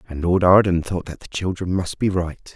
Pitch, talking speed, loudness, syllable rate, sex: 90 Hz, 235 wpm, -20 LUFS, 5.1 syllables/s, male